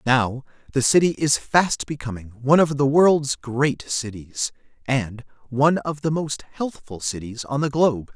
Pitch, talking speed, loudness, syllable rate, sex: 135 Hz, 160 wpm, -22 LUFS, 4.4 syllables/s, male